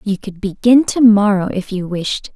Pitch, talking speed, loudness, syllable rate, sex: 205 Hz, 205 wpm, -15 LUFS, 4.4 syllables/s, female